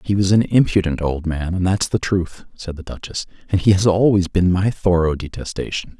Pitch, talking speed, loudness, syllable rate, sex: 90 Hz, 200 wpm, -18 LUFS, 5.2 syllables/s, male